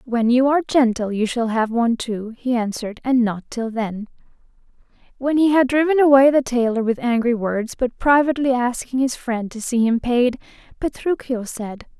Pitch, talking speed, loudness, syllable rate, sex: 245 Hz, 170 wpm, -19 LUFS, 5.1 syllables/s, female